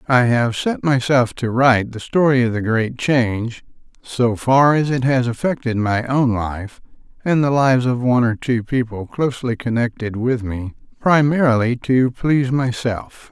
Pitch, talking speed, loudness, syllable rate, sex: 125 Hz, 165 wpm, -18 LUFS, 4.6 syllables/s, male